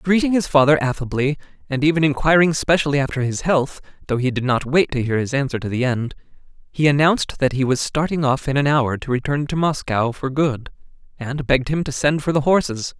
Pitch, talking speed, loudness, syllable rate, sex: 140 Hz, 215 wpm, -19 LUFS, 5.7 syllables/s, male